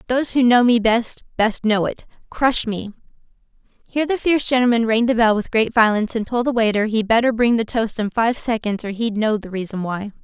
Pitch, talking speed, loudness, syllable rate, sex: 225 Hz, 225 wpm, -19 LUFS, 5.7 syllables/s, female